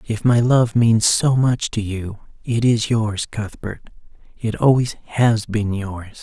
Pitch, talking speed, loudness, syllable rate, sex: 110 Hz, 155 wpm, -19 LUFS, 3.5 syllables/s, male